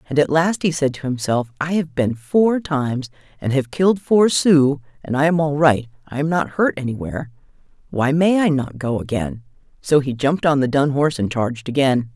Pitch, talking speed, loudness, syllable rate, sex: 145 Hz, 210 wpm, -19 LUFS, 5.3 syllables/s, female